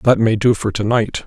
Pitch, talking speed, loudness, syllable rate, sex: 110 Hz, 285 wpm, -16 LUFS, 4.9 syllables/s, male